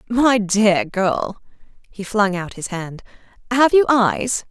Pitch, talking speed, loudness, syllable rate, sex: 210 Hz, 120 wpm, -18 LUFS, 3.5 syllables/s, female